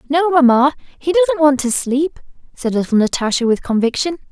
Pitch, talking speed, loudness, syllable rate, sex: 285 Hz, 165 wpm, -16 LUFS, 5.2 syllables/s, female